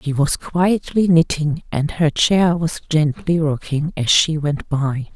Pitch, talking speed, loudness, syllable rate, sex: 155 Hz, 165 wpm, -18 LUFS, 3.7 syllables/s, female